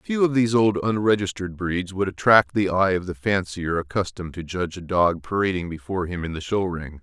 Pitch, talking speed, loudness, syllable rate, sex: 95 Hz, 215 wpm, -23 LUFS, 5.8 syllables/s, male